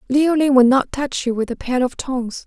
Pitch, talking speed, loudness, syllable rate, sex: 260 Hz, 245 wpm, -18 LUFS, 5.2 syllables/s, female